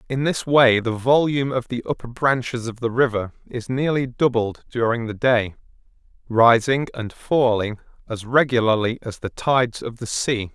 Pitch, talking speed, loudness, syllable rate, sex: 120 Hz, 165 wpm, -21 LUFS, 4.8 syllables/s, male